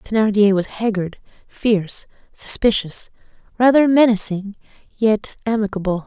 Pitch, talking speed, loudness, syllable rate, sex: 210 Hz, 90 wpm, -18 LUFS, 4.5 syllables/s, female